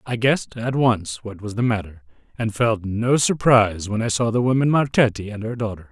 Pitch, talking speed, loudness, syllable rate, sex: 115 Hz, 215 wpm, -20 LUFS, 5.3 syllables/s, male